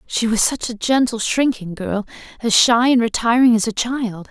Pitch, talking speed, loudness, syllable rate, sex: 230 Hz, 195 wpm, -17 LUFS, 4.7 syllables/s, female